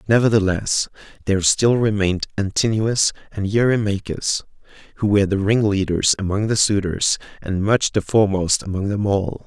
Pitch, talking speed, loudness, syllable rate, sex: 100 Hz, 135 wpm, -19 LUFS, 5.2 syllables/s, male